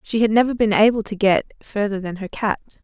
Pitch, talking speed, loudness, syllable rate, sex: 210 Hz, 235 wpm, -20 LUFS, 5.3 syllables/s, female